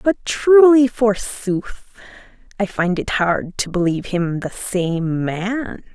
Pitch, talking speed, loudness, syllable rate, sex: 205 Hz, 130 wpm, -18 LUFS, 3.5 syllables/s, female